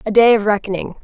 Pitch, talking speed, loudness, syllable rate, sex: 210 Hz, 235 wpm, -15 LUFS, 6.8 syllables/s, female